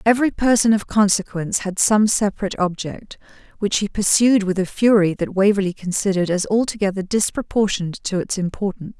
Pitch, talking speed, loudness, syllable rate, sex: 200 Hz, 155 wpm, -19 LUFS, 6.0 syllables/s, female